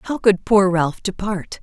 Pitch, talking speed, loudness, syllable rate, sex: 195 Hz, 185 wpm, -18 LUFS, 3.8 syllables/s, female